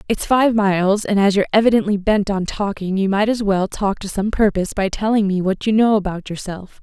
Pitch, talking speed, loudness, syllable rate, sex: 200 Hz, 230 wpm, -18 LUFS, 5.6 syllables/s, female